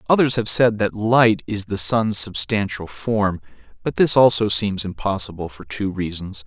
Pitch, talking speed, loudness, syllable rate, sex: 105 Hz, 165 wpm, -19 LUFS, 4.5 syllables/s, male